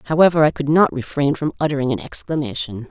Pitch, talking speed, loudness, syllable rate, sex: 145 Hz, 185 wpm, -19 LUFS, 6.4 syllables/s, female